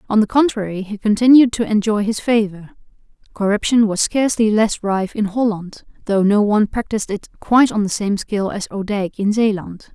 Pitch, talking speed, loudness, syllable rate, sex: 210 Hz, 180 wpm, -17 LUFS, 5.4 syllables/s, female